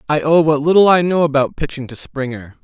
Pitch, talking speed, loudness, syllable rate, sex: 150 Hz, 230 wpm, -15 LUFS, 5.9 syllables/s, male